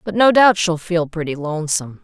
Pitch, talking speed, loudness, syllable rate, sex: 175 Hz, 205 wpm, -17 LUFS, 5.7 syllables/s, female